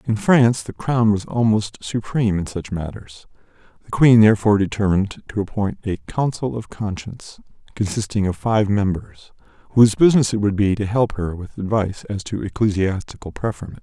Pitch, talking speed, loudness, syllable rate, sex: 105 Hz, 165 wpm, -20 LUFS, 5.5 syllables/s, male